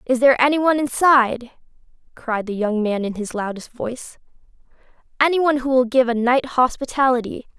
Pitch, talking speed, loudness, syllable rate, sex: 250 Hz, 150 wpm, -19 LUFS, 5.5 syllables/s, female